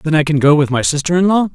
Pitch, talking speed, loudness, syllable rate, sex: 155 Hz, 350 wpm, -13 LUFS, 6.7 syllables/s, male